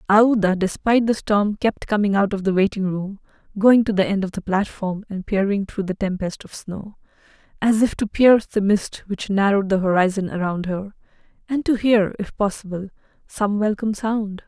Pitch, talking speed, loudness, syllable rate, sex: 200 Hz, 185 wpm, -20 LUFS, 5.2 syllables/s, female